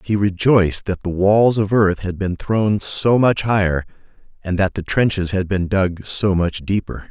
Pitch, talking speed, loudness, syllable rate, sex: 100 Hz, 195 wpm, -18 LUFS, 4.3 syllables/s, male